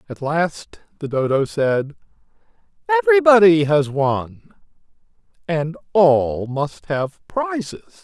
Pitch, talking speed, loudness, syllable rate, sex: 160 Hz, 95 wpm, -18 LUFS, 3.6 syllables/s, male